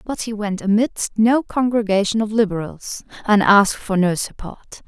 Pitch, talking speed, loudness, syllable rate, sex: 210 Hz, 160 wpm, -18 LUFS, 5.0 syllables/s, female